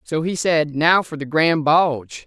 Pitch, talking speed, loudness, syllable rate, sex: 155 Hz, 210 wpm, -18 LUFS, 4.2 syllables/s, male